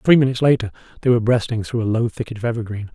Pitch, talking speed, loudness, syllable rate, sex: 115 Hz, 245 wpm, -20 LUFS, 7.9 syllables/s, male